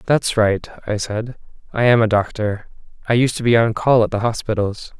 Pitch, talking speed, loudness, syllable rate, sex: 110 Hz, 205 wpm, -18 LUFS, 5.1 syllables/s, male